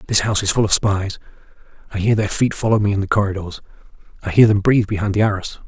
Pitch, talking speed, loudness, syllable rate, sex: 100 Hz, 235 wpm, -18 LUFS, 7.1 syllables/s, male